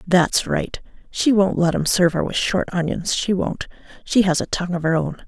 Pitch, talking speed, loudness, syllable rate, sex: 180 Hz, 225 wpm, -20 LUFS, 5.1 syllables/s, female